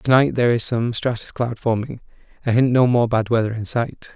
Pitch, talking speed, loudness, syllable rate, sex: 120 Hz, 215 wpm, -20 LUFS, 5.5 syllables/s, male